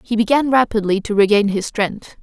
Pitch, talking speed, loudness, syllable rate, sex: 215 Hz, 190 wpm, -17 LUFS, 5.2 syllables/s, female